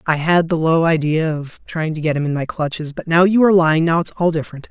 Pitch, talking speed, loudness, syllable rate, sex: 160 Hz, 280 wpm, -17 LUFS, 6.2 syllables/s, male